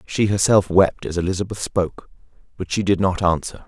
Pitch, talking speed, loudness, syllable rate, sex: 95 Hz, 180 wpm, -20 LUFS, 5.5 syllables/s, male